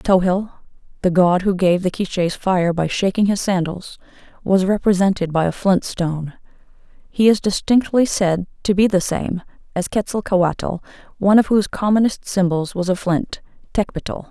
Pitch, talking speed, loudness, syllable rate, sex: 190 Hz, 155 wpm, -18 LUFS, 4.9 syllables/s, female